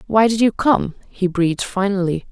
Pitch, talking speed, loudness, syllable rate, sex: 195 Hz, 180 wpm, -18 LUFS, 5.0 syllables/s, female